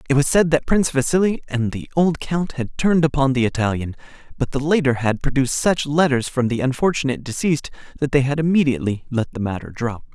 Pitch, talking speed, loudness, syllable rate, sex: 140 Hz, 200 wpm, -20 LUFS, 6.2 syllables/s, male